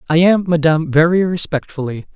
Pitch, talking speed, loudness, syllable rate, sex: 160 Hz, 140 wpm, -15 LUFS, 5.9 syllables/s, male